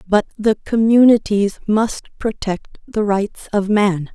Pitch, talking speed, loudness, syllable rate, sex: 210 Hz, 130 wpm, -17 LUFS, 3.6 syllables/s, female